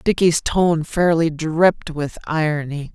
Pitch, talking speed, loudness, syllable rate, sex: 160 Hz, 120 wpm, -19 LUFS, 4.0 syllables/s, female